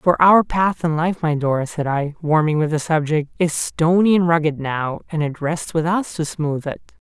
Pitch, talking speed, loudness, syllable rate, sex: 160 Hz, 220 wpm, -19 LUFS, 4.6 syllables/s, male